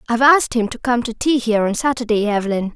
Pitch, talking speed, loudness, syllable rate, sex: 235 Hz, 240 wpm, -17 LUFS, 7.0 syllables/s, female